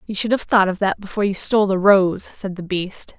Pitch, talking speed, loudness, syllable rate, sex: 195 Hz, 265 wpm, -19 LUFS, 5.7 syllables/s, female